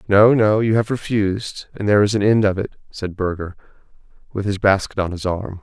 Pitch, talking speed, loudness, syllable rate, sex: 100 Hz, 215 wpm, -19 LUFS, 5.6 syllables/s, male